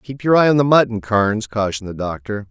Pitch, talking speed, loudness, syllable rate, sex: 115 Hz, 240 wpm, -17 LUFS, 6.1 syllables/s, male